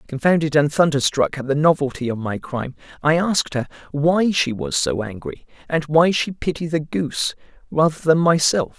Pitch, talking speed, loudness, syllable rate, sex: 155 Hz, 180 wpm, -20 LUFS, 5.2 syllables/s, male